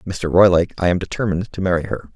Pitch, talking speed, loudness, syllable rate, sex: 90 Hz, 225 wpm, -18 LUFS, 6.8 syllables/s, male